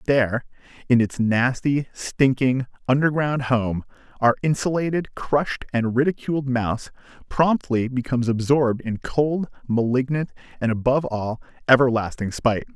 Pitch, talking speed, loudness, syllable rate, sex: 130 Hz, 115 wpm, -22 LUFS, 4.8 syllables/s, male